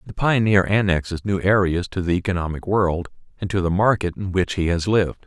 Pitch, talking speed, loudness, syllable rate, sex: 95 Hz, 205 wpm, -21 LUFS, 5.7 syllables/s, male